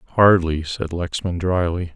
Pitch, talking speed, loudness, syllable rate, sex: 85 Hz, 125 wpm, -20 LUFS, 4.0 syllables/s, male